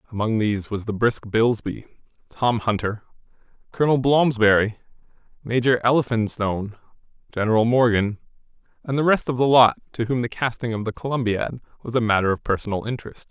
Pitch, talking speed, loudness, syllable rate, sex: 115 Hz, 150 wpm, -21 LUFS, 5.7 syllables/s, male